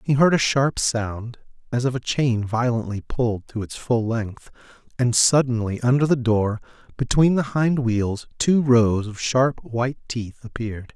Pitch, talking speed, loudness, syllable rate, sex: 120 Hz, 170 wpm, -21 LUFS, 4.3 syllables/s, male